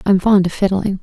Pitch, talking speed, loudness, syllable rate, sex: 190 Hz, 235 wpm, -15 LUFS, 5.5 syllables/s, female